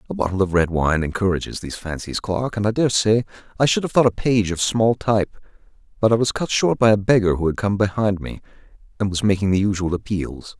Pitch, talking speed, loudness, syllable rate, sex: 105 Hz, 230 wpm, -20 LUFS, 6.1 syllables/s, male